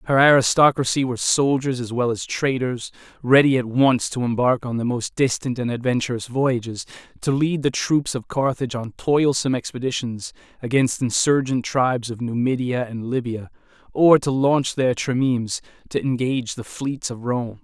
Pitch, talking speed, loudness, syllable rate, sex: 125 Hz, 160 wpm, -21 LUFS, 5.0 syllables/s, male